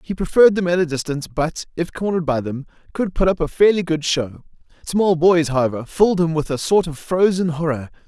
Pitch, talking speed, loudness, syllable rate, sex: 165 Hz, 215 wpm, -19 LUFS, 5.8 syllables/s, male